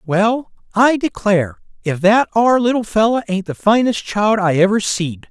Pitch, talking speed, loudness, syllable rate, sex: 205 Hz, 170 wpm, -16 LUFS, 4.8 syllables/s, male